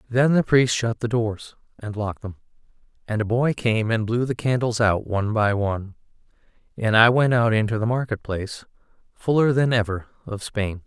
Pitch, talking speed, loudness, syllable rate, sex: 115 Hz, 190 wpm, -22 LUFS, 5.2 syllables/s, male